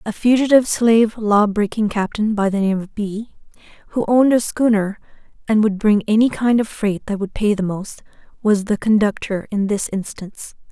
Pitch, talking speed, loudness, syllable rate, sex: 210 Hz, 185 wpm, -18 LUFS, 5.2 syllables/s, female